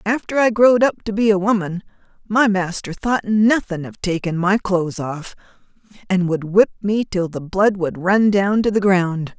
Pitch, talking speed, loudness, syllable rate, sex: 195 Hz, 190 wpm, -18 LUFS, 4.8 syllables/s, female